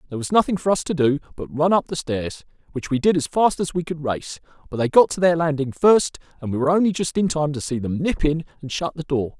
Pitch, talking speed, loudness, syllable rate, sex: 155 Hz, 280 wpm, -21 LUFS, 6.1 syllables/s, male